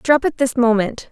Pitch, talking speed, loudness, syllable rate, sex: 250 Hz, 215 wpm, -17 LUFS, 4.7 syllables/s, female